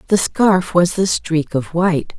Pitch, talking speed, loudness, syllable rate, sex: 175 Hz, 190 wpm, -16 LUFS, 4.1 syllables/s, female